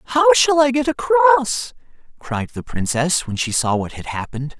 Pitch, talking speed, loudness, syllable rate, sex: 155 Hz, 185 wpm, -18 LUFS, 4.8 syllables/s, male